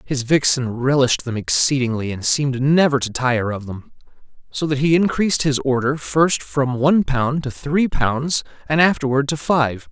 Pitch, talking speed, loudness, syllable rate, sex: 140 Hz, 175 wpm, -18 LUFS, 4.8 syllables/s, male